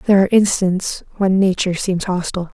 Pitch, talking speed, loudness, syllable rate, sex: 190 Hz, 160 wpm, -17 LUFS, 6.3 syllables/s, female